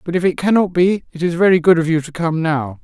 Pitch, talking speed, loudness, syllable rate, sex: 170 Hz, 295 wpm, -16 LUFS, 6.1 syllables/s, male